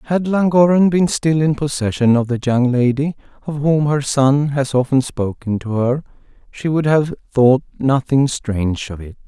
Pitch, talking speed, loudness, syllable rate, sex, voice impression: 140 Hz, 175 wpm, -17 LUFS, 4.6 syllables/s, male, masculine, adult-like, tensed, bright, soft, slightly halting, cool, calm, friendly, reassuring, slightly wild, kind, slightly modest